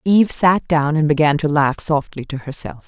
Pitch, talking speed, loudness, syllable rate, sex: 150 Hz, 210 wpm, -17 LUFS, 5.1 syllables/s, female